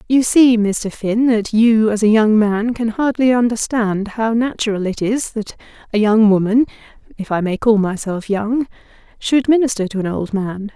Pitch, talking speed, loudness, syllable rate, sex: 220 Hz, 175 wpm, -16 LUFS, 4.6 syllables/s, female